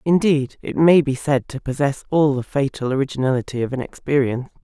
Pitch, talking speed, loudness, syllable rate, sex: 140 Hz, 170 wpm, -20 LUFS, 5.8 syllables/s, female